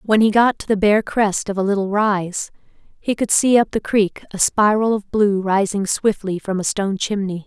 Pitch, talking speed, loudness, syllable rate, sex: 205 Hz, 215 wpm, -18 LUFS, 4.8 syllables/s, female